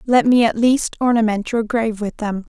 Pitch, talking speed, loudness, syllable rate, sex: 225 Hz, 210 wpm, -18 LUFS, 5.2 syllables/s, female